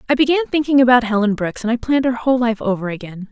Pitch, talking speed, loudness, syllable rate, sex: 240 Hz, 255 wpm, -17 LUFS, 7.3 syllables/s, female